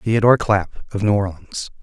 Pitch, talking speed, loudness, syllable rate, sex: 100 Hz, 165 wpm, -19 LUFS, 5.8 syllables/s, male